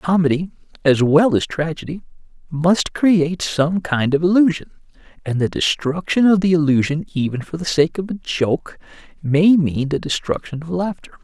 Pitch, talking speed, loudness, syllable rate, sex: 165 Hz, 160 wpm, -18 LUFS, 4.9 syllables/s, male